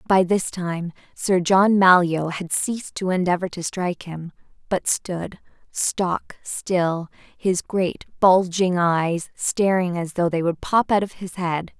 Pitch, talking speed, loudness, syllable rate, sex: 180 Hz, 160 wpm, -21 LUFS, 3.6 syllables/s, female